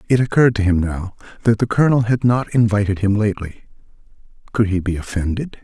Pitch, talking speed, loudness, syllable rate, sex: 105 Hz, 170 wpm, -18 LUFS, 6.3 syllables/s, male